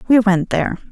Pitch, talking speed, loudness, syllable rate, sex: 210 Hz, 195 wpm, -16 LUFS, 6.2 syllables/s, female